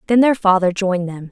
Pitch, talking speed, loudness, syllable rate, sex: 195 Hz, 230 wpm, -16 LUFS, 6.2 syllables/s, female